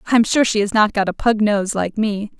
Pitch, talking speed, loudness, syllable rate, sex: 210 Hz, 275 wpm, -17 LUFS, 5.2 syllables/s, female